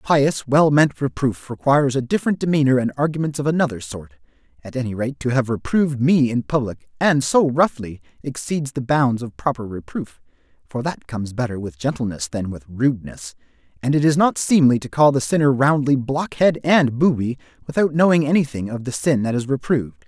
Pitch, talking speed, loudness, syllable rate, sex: 130 Hz, 185 wpm, -20 LUFS, 5.4 syllables/s, male